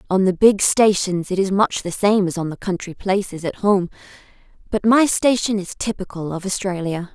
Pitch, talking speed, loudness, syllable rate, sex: 195 Hz, 195 wpm, -19 LUFS, 5.1 syllables/s, female